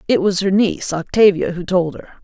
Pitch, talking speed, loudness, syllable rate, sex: 185 Hz, 215 wpm, -17 LUFS, 5.7 syllables/s, female